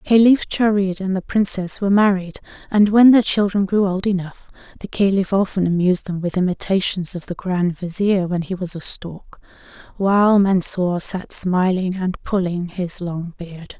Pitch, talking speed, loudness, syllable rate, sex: 190 Hz, 165 wpm, -18 LUFS, 4.7 syllables/s, female